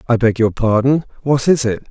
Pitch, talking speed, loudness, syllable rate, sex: 125 Hz, 220 wpm, -16 LUFS, 5.2 syllables/s, male